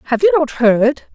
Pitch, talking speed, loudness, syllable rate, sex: 270 Hz, 210 wpm, -14 LUFS, 5.7 syllables/s, female